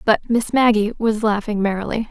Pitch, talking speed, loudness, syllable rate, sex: 215 Hz, 170 wpm, -19 LUFS, 5.4 syllables/s, female